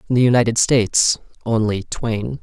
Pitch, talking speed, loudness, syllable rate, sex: 115 Hz, 150 wpm, -18 LUFS, 5.0 syllables/s, male